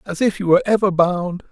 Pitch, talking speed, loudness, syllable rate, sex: 185 Hz, 240 wpm, -17 LUFS, 6.1 syllables/s, male